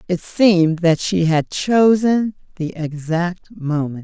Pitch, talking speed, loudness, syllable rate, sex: 175 Hz, 135 wpm, -18 LUFS, 3.7 syllables/s, female